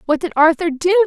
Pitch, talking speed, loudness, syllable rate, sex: 335 Hz, 225 wpm, -16 LUFS, 5.6 syllables/s, female